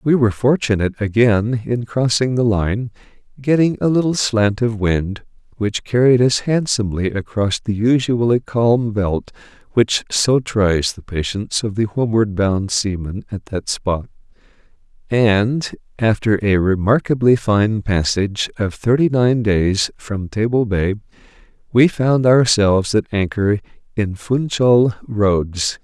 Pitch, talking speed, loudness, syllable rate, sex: 110 Hz, 130 wpm, -17 LUFS, 4.1 syllables/s, male